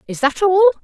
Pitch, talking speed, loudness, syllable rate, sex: 340 Hz, 215 wpm, -15 LUFS, 8.3 syllables/s, female